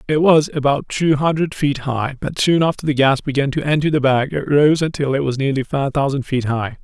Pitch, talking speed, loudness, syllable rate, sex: 140 Hz, 235 wpm, -17 LUFS, 5.3 syllables/s, male